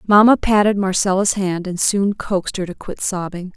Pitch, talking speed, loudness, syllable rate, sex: 195 Hz, 185 wpm, -18 LUFS, 5.3 syllables/s, female